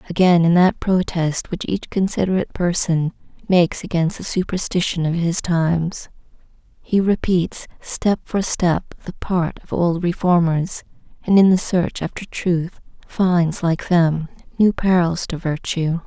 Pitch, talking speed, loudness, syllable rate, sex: 175 Hz, 140 wpm, -19 LUFS, 4.2 syllables/s, female